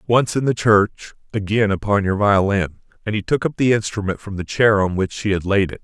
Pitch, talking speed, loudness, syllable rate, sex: 105 Hz, 235 wpm, -19 LUFS, 5.5 syllables/s, male